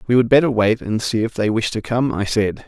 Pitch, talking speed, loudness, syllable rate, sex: 115 Hz, 290 wpm, -18 LUFS, 5.6 syllables/s, male